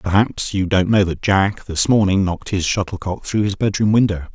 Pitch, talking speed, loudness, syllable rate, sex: 95 Hz, 205 wpm, -18 LUFS, 5.3 syllables/s, male